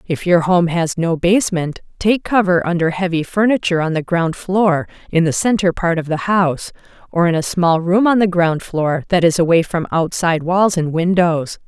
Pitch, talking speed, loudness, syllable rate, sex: 175 Hz, 200 wpm, -16 LUFS, 5.0 syllables/s, female